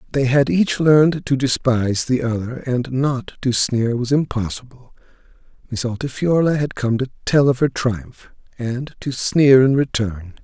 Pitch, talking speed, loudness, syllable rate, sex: 130 Hz, 160 wpm, -18 LUFS, 4.4 syllables/s, male